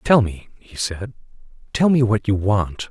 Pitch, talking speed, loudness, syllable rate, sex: 105 Hz, 165 wpm, -20 LUFS, 4.2 syllables/s, male